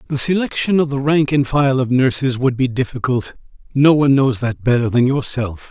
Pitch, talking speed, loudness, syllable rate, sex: 130 Hz, 190 wpm, -16 LUFS, 5.3 syllables/s, male